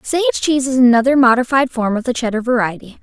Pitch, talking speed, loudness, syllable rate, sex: 250 Hz, 200 wpm, -15 LUFS, 6.4 syllables/s, female